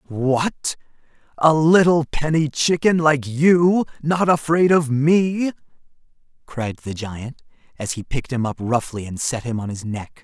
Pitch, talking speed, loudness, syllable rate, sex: 145 Hz, 150 wpm, -19 LUFS, 4.1 syllables/s, male